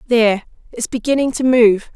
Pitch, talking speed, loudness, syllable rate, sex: 235 Hz, 125 wpm, -16 LUFS, 5.6 syllables/s, female